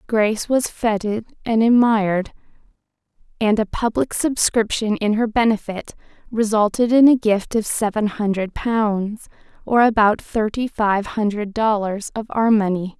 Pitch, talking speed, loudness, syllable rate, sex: 215 Hz, 135 wpm, -19 LUFS, 4.4 syllables/s, female